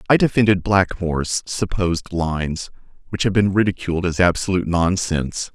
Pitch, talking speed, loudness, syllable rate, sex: 90 Hz, 130 wpm, -20 LUFS, 5.5 syllables/s, male